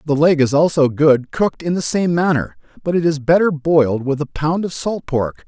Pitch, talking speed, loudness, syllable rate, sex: 150 Hz, 230 wpm, -17 LUFS, 5.1 syllables/s, male